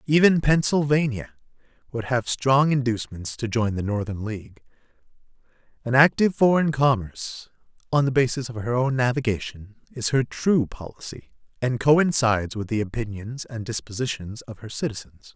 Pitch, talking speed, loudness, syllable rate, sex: 120 Hz, 140 wpm, -23 LUFS, 5.1 syllables/s, male